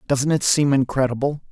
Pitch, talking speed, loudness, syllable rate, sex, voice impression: 140 Hz, 160 wpm, -19 LUFS, 5.4 syllables/s, male, masculine, adult-like, slightly tensed, intellectual, refreshing